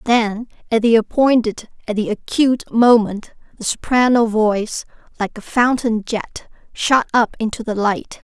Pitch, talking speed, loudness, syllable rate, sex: 225 Hz, 145 wpm, -17 LUFS, 4.4 syllables/s, female